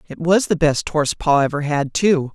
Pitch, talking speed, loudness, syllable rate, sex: 155 Hz, 230 wpm, -18 LUFS, 5.0 syllables/s, male